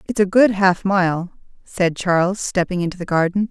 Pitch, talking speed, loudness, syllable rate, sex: 185 Hz, 190 wpm, -18 LUFS, 5.0 syllables/s, female